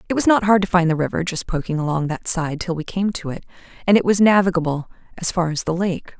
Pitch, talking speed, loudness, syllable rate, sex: 175 Hz, 260 wpm, -20 LUFS, 6.2 syllables/s, female